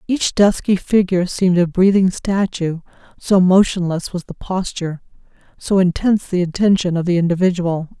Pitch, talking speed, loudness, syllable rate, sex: 185 Hz, 145 wpm, -17 LUFS, 5.3 syllables/s, female